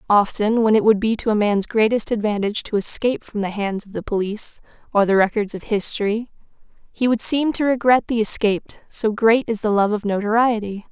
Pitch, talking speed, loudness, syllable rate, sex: 215 Hz, 205 wpm, -19 LUFS, 5.8 syllables/s, female